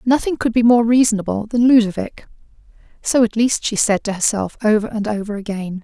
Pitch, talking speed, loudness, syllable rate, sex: 220 Hz, 185 wpm, -17 LUFS, 5.7 syllables/s, female